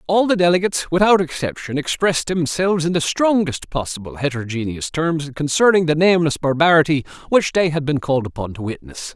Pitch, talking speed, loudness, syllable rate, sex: 155 Hz, 165 wpm, -18 LUFS, 6.0 syllables/s, male